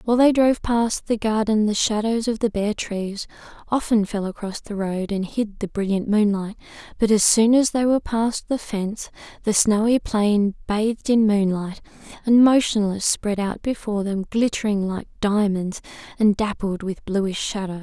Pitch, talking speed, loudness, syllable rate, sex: 210 Hz, 170 wpm, -21 LUFS, 4.7 syllables/s, female